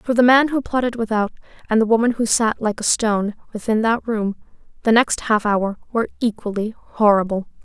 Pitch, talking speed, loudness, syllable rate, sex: 220 Hz, 190 wpm, -19 LUFS, 5.4 syllables/s, female